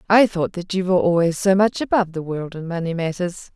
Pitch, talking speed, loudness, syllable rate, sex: 180 Hz, 235 wpm, -20 LUFS, 6.0 syllables/s, female